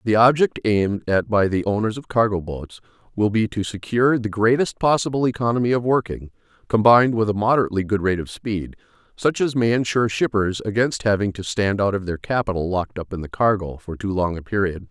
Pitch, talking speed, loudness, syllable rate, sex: 105 Hz, 205 wpm, -21 LUFS, 5.9 syllables/s, male